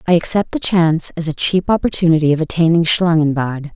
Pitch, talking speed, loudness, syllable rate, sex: 165 Hz, 175 wpm, -15 LUFS, 5.9 syllables/s, female